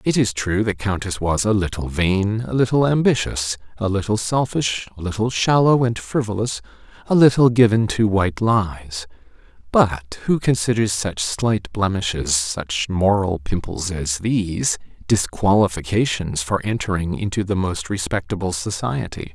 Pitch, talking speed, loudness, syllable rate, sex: 100 Hz, 135 wpm, -20 LUFS, 4.5 syllables/s, male